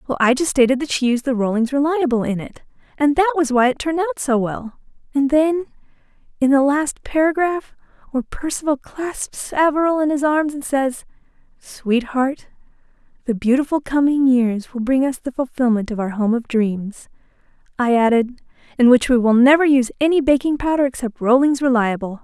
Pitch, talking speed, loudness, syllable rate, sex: 265 Hz, 175 wpm, -18 LUFS, 5.3 syllables/s, female